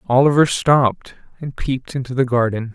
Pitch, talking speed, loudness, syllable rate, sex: 130 Hz, 155 wpm, -17 LUFS, 5.6 syllables/s, male